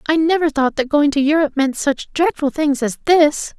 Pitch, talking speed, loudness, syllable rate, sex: 295 Hz, 215 wpm, -17 LUFS, 5.3 syllables/s, female